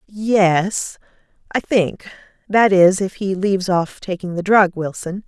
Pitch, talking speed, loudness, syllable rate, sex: 190 Hz, 135 wpm, -18 LUFS, 3.8 syllables/s, female